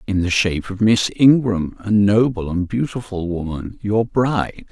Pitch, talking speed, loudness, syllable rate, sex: 100 Hz, 155 wpm, -18 LUFS, 4.6 syllables/s, male